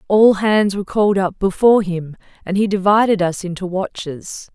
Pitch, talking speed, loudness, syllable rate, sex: 195 Hz, 170 wpm, -17 LUFS, 5.2 syllables/s, female